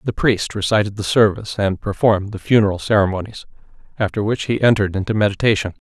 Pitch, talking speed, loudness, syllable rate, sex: 105 Hz, 155 wpm, -18 LUFS, 6.7 syllables/s, male